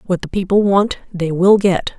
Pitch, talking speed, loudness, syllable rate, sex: 190 Hz, 210 wpm, -15 LUFS, 4.8 syllables/s, female